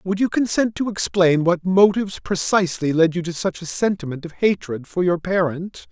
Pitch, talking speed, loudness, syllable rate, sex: 180 Hz, 195 wpm, -20 LUFS, 5.2 syllables/s, male